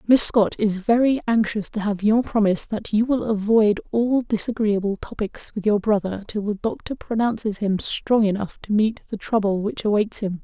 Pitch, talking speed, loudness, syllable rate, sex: 215 Hz, 190 wpm, -21 LUFS, 5.0 syllables/s, female